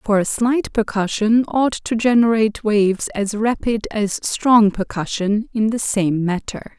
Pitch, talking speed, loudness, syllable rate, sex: 215 Hz, 150 wpm, -18 LUFS, 4.2 syllables/s, female